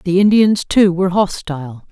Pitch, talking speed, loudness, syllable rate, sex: 185 Hz, 155 wpm, -14 LUFS, 4.8 syllables/s, female